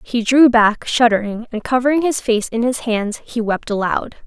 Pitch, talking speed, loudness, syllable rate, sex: 235 Hz, 195 wpm, -17 LUFS, 4.8 syllables/s, female